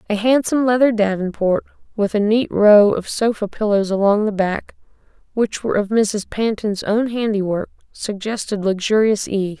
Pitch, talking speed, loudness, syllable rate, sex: 210 Hz, 150 wpm, -18 LUFS, 4.8 syllables/s, female